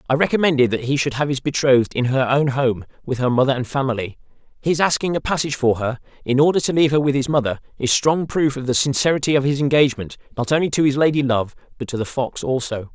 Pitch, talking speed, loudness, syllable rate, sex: 135 Hz, 235 wpm, -19 LUFS, 6.6 syllables/s, male